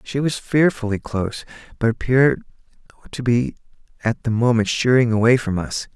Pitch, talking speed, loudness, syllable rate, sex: 120 Hz, 150 wpm, -20 LUFS, 5.3 syllables/s, male